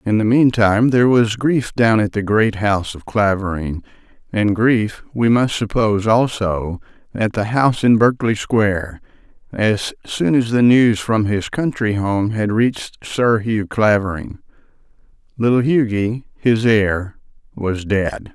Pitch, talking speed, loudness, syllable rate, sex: 110 Hz, 145 wpm, -17 LUFS, 4.2 syllables/s, male